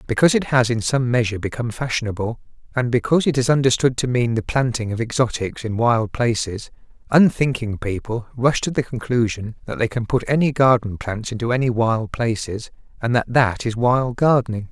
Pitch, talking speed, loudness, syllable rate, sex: 120 Hz, 185 wpm, -20 LUFS, 5.5 syllables/s, male